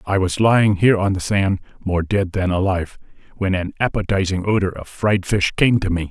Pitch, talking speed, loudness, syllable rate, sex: 95 Hz, 205 wpm, -19 LUFS, 5.6 syllables/s, male